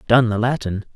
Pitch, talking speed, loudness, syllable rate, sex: 115 Hz, 190 wpm, -19 LUFS, 5.5 syllables/s, male